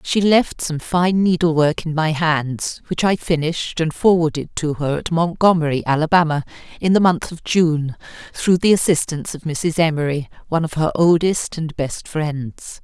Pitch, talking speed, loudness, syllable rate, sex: 160 Hz, 175 wpm, -18 LUFS, 4.7 syllables/s, female